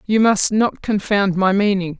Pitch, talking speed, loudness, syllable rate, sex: 200 Hz, 180 wpm, -17 LUFS, 4.2 syllables/s, female